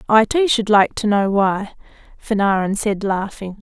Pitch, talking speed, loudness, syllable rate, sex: 210 Hz, 165 wpm, -18 LUFS, 4.4 syllables/s, female